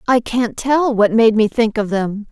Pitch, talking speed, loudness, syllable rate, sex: 225 Hz, 235 wpm, -16 LUFS, 4.2 syllables/s, female